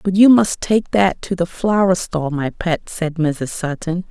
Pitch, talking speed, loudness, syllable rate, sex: 175 Hz, 205 wpm, -17 LUFS, 4.1 syllables/s, female